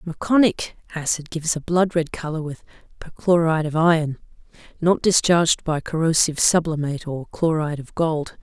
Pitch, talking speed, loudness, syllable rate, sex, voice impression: 160 Hz, 145 wpm, -21 LUFS, 5.5 syllables/s, female, feminine, adult-like, relaxed, slightly weak, soft, fluent, intellectual, calm, reassuring, elegant, kind, modest